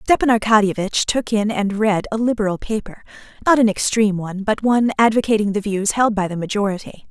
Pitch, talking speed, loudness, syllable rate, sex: 210 Hz, 185 wpm, -18 LUFS, 6.0 syllables/s, female